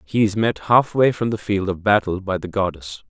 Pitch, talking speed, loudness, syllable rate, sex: 100 Hz, 230 wpm, -20 LUFS, 5.1 syllables/s, male